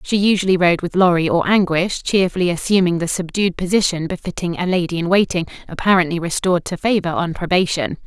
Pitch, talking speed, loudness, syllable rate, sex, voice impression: 180 Hz, 170 wpm, -18 LUFS, 6.0 syllables/s, female, feminine, adult-like, very fluent, intellectual, slightly refreshing